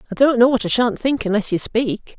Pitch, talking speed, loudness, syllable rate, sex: 230 Hz, 275 wpm, -18 LUFS, 5.7 syllables/s, female